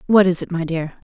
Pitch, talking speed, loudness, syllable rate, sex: 175 Hz, 270 wpm, -19 LUFS, 5.8 syllables/s, female